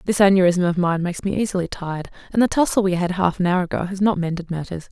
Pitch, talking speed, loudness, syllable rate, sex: 185 Hz, 255 wpm, -20 LUFS, 6.8 syllables/s, female